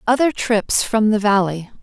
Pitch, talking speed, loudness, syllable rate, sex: 215 Hz, 165 wpm, -17 LUFS, 4.4 syllables/s, female